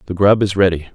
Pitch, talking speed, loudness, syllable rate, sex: 95 Hz, 255 wpm, -15 LUFS, 7.0 syllables/s, male